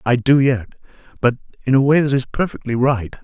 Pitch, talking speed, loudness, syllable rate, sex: 130 Hz, 205 wpm, -17 LUFS, 5.8 syllables/s, male